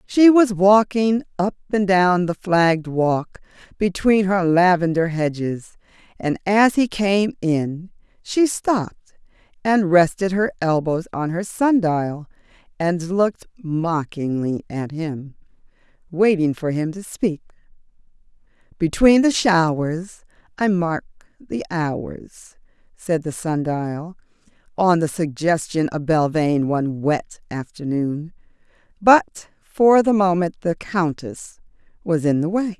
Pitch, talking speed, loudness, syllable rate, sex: 175 Hz, 120 wpm, -19 LUFS, 3.5 syllables/s, female